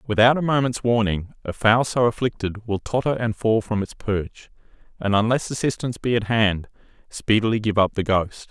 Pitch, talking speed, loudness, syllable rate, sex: 110 Hz, 185 wpm, -22 LUFS, 5.1 syllables/s, male